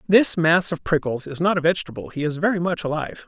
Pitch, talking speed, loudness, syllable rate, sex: 170 Hz, 240 wpm, -22 LUFS, 6.4 syllables/s, male